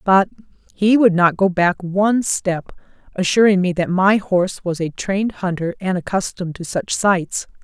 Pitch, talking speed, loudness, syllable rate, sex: 185 Hz, 175 wpm, -18 LUFS, 4.8 syllables/s, female